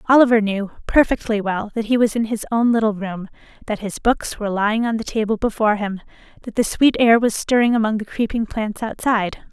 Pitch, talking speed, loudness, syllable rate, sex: 220 Hz, 210 wpm, -19 LUFS, 5.8 syllables/s, female